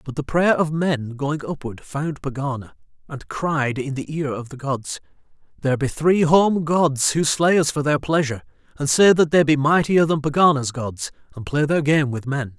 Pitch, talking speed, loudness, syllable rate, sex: 145 Hz, 205 wpm, -20 LUFS, 4.8 syllables/s, male